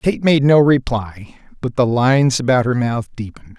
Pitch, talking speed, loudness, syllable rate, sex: 125 Hz, 185 wpm, -16 LUFS, 4.8 syllables/s, male